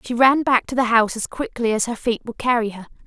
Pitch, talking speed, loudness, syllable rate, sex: 235 Hz, 275 wpm, -20 LUFS, 6.1 syllables/s, female